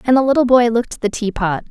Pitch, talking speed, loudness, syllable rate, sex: 235 Hz, 315 wpm, -16 LUFS, 7.0 syllables/s, female